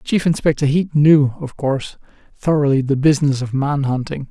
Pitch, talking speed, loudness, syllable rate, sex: 145 Hz, 165 wpm, -17 LUFS, 5.3 syllables/s, male